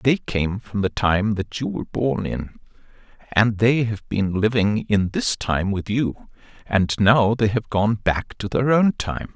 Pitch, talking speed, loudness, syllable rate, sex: 110 Hz, 190 wpm, -21 LUFS, 3.9 syllables/s, male